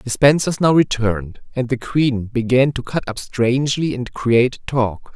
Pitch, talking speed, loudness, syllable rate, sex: 125 Hz, 175 wpm, -18 LUFS, 4.5 syllables/s, male